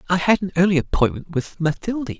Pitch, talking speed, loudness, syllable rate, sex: 175 Hz, 190 wpm, -20 LUFS, 6.3 syllables/s, male